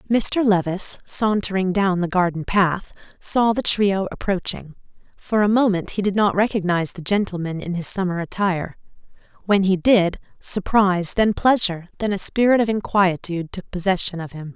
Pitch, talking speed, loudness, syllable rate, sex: 190 Hz, 160 wpm, -20 LUFS, 5.2 syllables/s, female